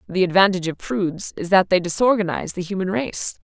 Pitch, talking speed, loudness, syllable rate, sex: 190 Hz, 190 wpm, -20 LUFS, 6.2 syllables/s, female